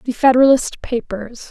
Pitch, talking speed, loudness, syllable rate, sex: 245 Hz, 120 wpm, -15 LUFS, 4.8 syllables/s, female